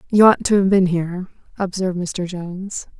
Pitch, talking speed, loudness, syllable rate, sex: 185 Hz, 180 wpm, -19 LUFS, 5.5 syllables/s, female